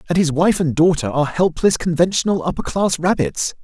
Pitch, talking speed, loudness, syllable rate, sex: 165 Hz, 165 wpm, -18 LUFS, 5.6 syllables/s, male